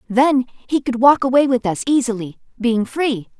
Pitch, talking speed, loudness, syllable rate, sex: 245 Hz, 175 wpm, -17 LUFS, 4.6 syllables/s, female